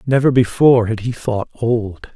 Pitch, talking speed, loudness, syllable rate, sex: 120 Hz, 165 wpm, -16 LUFS, 4.6 syllables/s, male